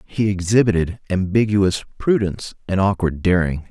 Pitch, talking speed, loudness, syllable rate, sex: 95 Hz, 115 wpm, -19 LUFS, 5.0 syllables/s, male